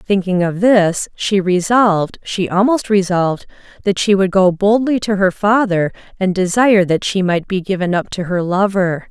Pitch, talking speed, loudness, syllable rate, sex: 190 Hz, 165 wpm, -15 LUFS, 4.7 syllables/s, female